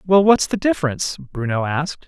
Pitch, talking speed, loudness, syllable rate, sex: 160 Hz, 175 wpm, -19 LUFS, 5.6 syllables/s, male